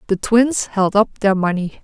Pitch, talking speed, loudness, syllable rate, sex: 205 Hz, 195 wpm, -17 LUFS, 4.3 syllables/s, female